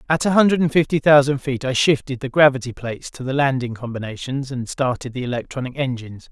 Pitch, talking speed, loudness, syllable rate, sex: 135 Hz, 200 wpm, -20 LUFS, 6.2 syllables/s, male